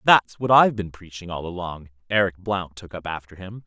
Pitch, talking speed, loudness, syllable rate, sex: 95 Hz, 215 wpm, -23 LUFS, 5.4 syllables/s, male